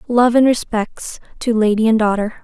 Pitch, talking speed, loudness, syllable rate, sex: 225 Hz, 170 wpm, -16 LUFS, 4.8 syllables/s, female